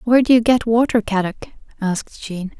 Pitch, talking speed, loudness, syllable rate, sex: 220 Hz, 185 wpm, -18 LUFS, 5.9 syllables/s, female